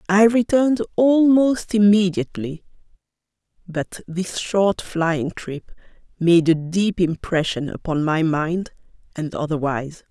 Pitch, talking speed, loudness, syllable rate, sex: 180 Hz, 105 wpm, -20 LUFS, 4.0 syllables/s, female